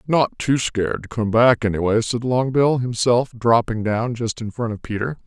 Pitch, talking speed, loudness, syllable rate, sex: 115 Hz, 195 wpm, -20 LUFS, 4.9 syllables/s, male